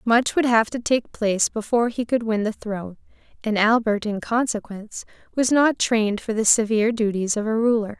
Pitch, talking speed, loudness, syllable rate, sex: 225 Hz, 195 wpm, -21 LUFS, 5.5 syllables/s, female